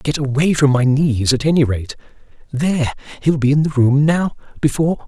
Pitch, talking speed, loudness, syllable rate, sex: 140 Hz, 175 wpm, -16 LUFS, 5.4 syllables/s, male